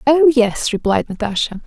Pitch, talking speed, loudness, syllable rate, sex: 245 Hz, 145 wpm, -16 LUFS, 4.6 syllables/s, female